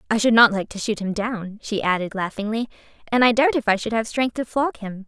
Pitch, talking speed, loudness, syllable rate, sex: 220 Hz, 260 wpm, -21 LUFS, 5.7 syllables/s, female